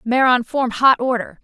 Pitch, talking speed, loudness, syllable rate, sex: 250 Hz, 210 wpm, -17 LUFS, 4.5 syllables/s, female